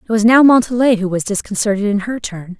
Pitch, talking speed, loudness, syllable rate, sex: 215 Hz, 230 wpm, -14 LUFS, 6.0 syllables/s, female